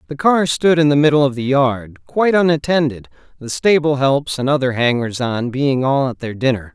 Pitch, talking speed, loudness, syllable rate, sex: 135 Hz, 205 wpm, -16 LUFS, 5.1 syllables/s, male